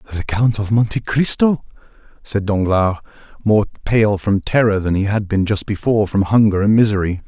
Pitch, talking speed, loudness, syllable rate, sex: 105 Hz, 175 wpm, -17 LUFS, 5.0 syllables/s, male